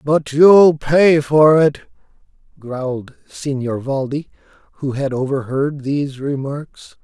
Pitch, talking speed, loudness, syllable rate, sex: 140 Hz, 110 wpm, -16 LUFS, 3.7 syllables/s, male